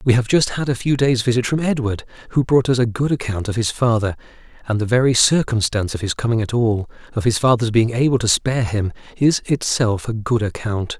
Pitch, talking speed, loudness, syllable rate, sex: 115 Hz, 225 wpm, -19 LUFS, 5.7 syllables/s, male